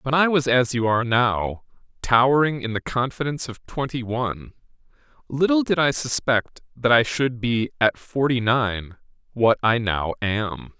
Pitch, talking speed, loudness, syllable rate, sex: 125 Hz, 160 wpm, -22 LUFS, 4.5 syllables/s, male